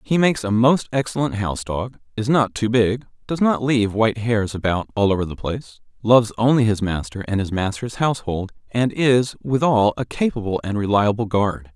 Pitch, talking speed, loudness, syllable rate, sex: 110 Hz, 190 wpm, -20 LUFS, 5.3 syllables/s, male